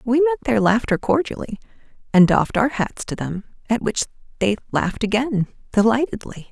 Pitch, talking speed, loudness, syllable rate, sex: 220 Hz, 155 wpm, -20 LUFS, 5.6 syllables/s, female